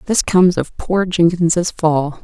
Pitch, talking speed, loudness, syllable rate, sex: 170 Hz, 160 wpm, -15 LUFS, 3.9 syllables/s, female